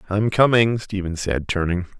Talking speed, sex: 150 wpm, male